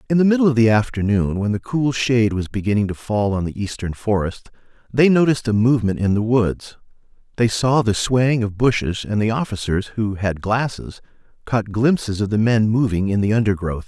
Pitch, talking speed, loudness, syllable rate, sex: 110 Hz, 200 wpm, -19 LUFS, 5.4 syllables/s, male